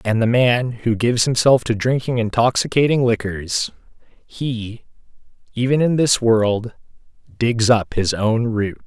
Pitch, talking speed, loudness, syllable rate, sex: 115 Hz, 135 wpm, -18 LUFS, 4.0 syllables/s, male